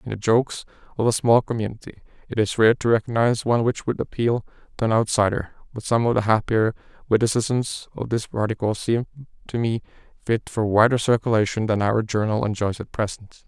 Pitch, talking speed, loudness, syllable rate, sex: 110 Hz, 185 wpm, -22 LUFS, 5.8 syllables/s, male